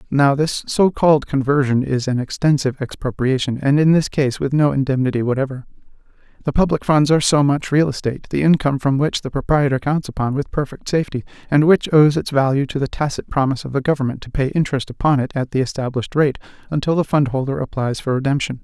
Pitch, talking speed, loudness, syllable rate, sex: 140 Hz, 205 wpm, -18 LUFS, 6.3 syllables/s, male